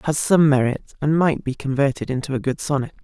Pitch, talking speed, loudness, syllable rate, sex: 140 Hz, 215 wpm, -20 LUFS, 6.0 syllables/s, female